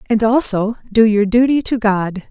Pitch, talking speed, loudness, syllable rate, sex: 220 Hz, 180 wpm, -15 LUFS, 4.5 syllables/s, female